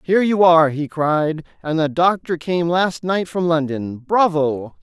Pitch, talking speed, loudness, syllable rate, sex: 165 Hz, 175 wpm, -18 LUFS, 4.2 syllables/s, male